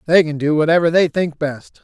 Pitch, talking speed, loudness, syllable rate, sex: 160 Hz, 230 wpm, -16 LUFS, 5.4 syllables/s, male